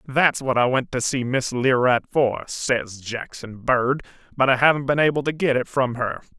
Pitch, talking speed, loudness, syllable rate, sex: 130 Hz, 205 wpm, -21 LUFS, 4.6 syllables/s, male